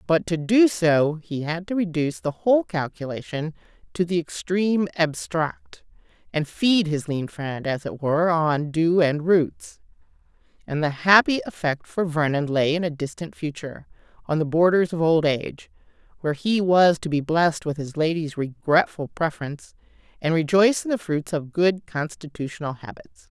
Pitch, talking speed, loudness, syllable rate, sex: 165 Hz, 165 wpm, -23 LUFS, 4.9 syllables/s, female